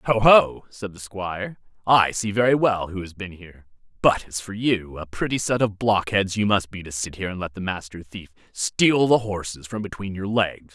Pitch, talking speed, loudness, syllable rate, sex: 100 Hz, 225 wpm, -22 LUFS, 5.0 syllables/s, male